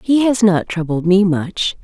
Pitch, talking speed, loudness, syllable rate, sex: 190 Hz, 195 wpm, -15 LUFS, 4.1 syllables/s, female